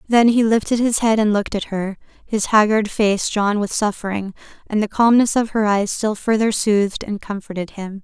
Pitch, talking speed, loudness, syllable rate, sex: 210 Hz, 200 wpm, -18 LUFS, 5.1 syllables/s, female